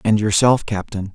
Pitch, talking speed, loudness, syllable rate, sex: 105 Hz, 160 wpm, -17 LUFS, 4.8 syllables/s, male